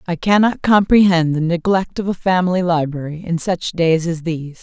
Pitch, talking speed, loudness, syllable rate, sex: 175 Hz, 180 wpm, -17 LUFS, 5.2 syllables/s, female